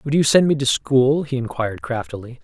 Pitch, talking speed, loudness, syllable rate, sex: 130 Hz, 220 wpm, -19 LUFS, 5.6 syllables/s, male